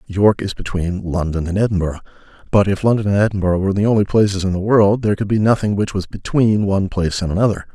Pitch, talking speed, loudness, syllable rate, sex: 100 Hz, 225 wpm, -17 LUFS, 6.6 syllables/s, male